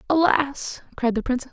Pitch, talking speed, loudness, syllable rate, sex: 270 Hz, 160 wpm, -23 LUFS, 5.0 syllables/s, female